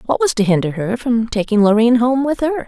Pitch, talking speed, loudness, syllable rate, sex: 235 Hz, 245 wpm, -16 LUFS, 5.6 syllables/s, female